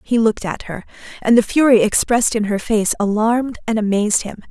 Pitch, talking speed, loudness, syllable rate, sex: 220 Hz, 200 wpm, -17 LUFS, 5.9 syllables/s, female